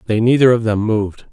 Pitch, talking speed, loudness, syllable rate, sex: 110 Hz, 225 wpm, -15 LUFS, 6.3 syllables/s, male